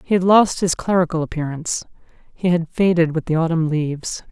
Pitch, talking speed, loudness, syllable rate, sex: 170 Hz, 165 wpm, -19 LUFS, 5.7 syllables/s, female